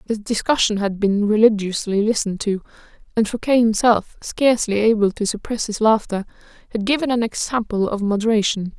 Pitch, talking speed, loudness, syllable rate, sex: 215 Hz, 150 wpm, -19 LUFS, 5.5 syllables/s, female